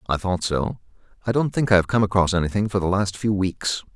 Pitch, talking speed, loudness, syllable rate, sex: 100 Hz, 240 wpm, -22 LUFS, 6.0 syllables/s, male